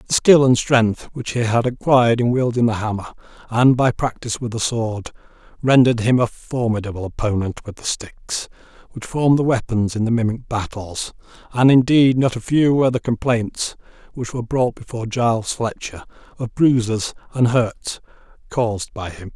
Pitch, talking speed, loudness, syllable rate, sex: 120 Hz, 170 wpm, -19 LUFS, 5.1 syllables/s, male